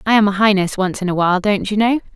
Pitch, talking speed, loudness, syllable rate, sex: 200 Hz, 305 wpm, -16 LUFS, 6.8 syllables/s, female